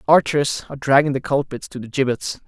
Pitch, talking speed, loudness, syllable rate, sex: 135 Hz, 220 wpm, -20 LUFS, 6.3 syllables/s, male